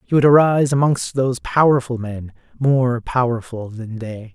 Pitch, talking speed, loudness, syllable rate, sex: 125 Hz, 150 wpm, -18 LUFS, 4.8 syllables/s, male